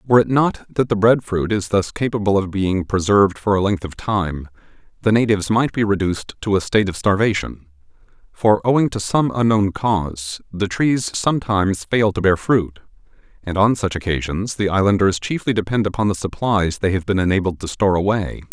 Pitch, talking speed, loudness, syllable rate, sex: 100 Hz, 190 wpm, -19 LUFS, 5.5 syllables/s, male